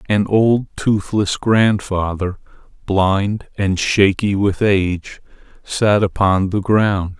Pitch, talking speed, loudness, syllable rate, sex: 100 Hz, 110 wpm, -17 LUFS, 3.2 syllables/s, male